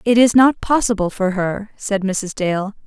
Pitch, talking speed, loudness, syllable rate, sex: 210 Hz, 190 wpm, -17 LUFS, 4.2 syllables/s, female